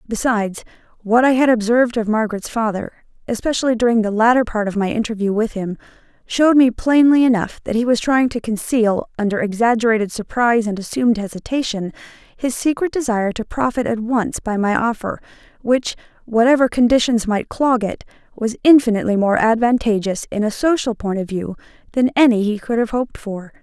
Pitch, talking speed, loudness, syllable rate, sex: 230 Hz, 170 wpm, -18 LUFS, 5.8 syllables/s, female